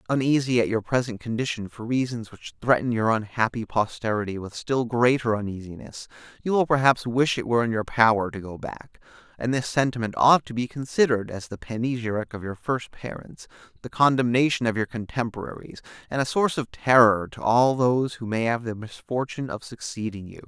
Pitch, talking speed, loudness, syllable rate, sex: 120 Hz, 185 wpm, -24 LUFS, 5.7 syllables/s, male